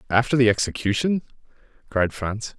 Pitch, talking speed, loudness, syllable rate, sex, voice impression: 115 Hz, 115 wpm, -22 LUFS, 5.2 syllables/s, male, very masculine, middle-aged, very thick, tensed, very powerful, bright, soft, muffled, fluent, raspy, cool, intellectual, slightly refreshing, sincere, very calm, very mature, friendly, reassuring, very unique, elegant, very wild, sweet, lively, kind